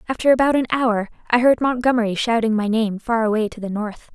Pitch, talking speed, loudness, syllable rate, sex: 230 Hz, 215 wpm, -19 LUFS, 5.9 syllables/s, female